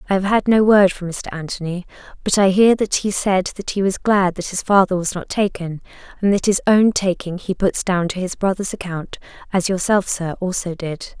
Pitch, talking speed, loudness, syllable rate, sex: 190 Hz, 220 wpm, -18 LUFS, 5.1 syllables/s, female